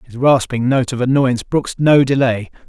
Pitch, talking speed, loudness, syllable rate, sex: 130 Hz, 180 wpm, -15 LUFS, 5.4 syllables/s, male